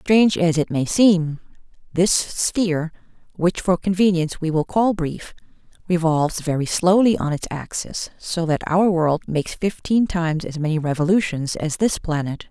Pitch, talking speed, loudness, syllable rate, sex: 170 Hz, 160 wpm, -20 LUFS, 4.7 syllables/s, female